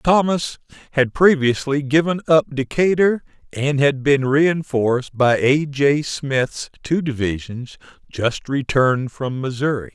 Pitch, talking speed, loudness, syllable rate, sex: 140 Hz, 120 wpm, -19 LUFS, 3.9 syllables/s, male